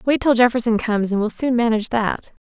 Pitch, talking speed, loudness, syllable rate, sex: 230 Hz, 220 wpm, -19 LUFS, 6.3 syllables/s, female